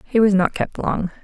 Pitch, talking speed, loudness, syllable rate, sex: 200 Hz, 245 wpm, -19 LUFS, 4.8 syllables/s, female